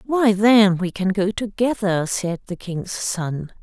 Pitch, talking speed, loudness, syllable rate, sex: 200 Hz, 165 wpm, -20 LUFS, 3.6 syllables/s, female